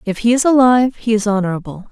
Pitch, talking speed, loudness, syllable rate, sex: 225 Hz, 220 wpm, -14 LUFS, 6.9 syllables/s, female